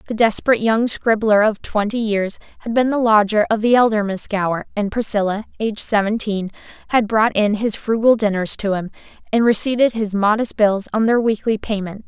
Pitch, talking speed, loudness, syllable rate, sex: 215 Hz, 185 wpm, -18 LUFS, 5.4 syllables/s, female